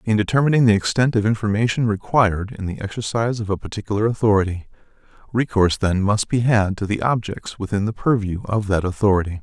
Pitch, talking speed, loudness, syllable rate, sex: 105 Hz, 180 wpm, -20 LUFS, 6.3 syllables/s, male